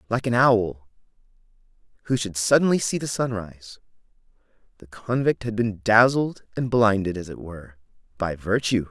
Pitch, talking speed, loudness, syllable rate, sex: 110 Hz, 150 wpm, -22 LUFS, 4.8 syllables/s, male